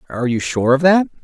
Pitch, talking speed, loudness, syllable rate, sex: 145 Hz, 245 wpm, -16 LUFS, 6.6 syllables/s, male